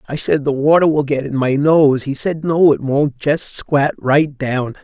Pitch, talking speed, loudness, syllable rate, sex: 145 Hz, 225 wpm, -16 LUFS, 4.2 syllables/s, male